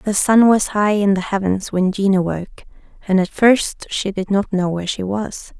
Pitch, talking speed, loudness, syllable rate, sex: 195 Hz, 215 wpm, -17 LUFS, 5.0 syllables/s, female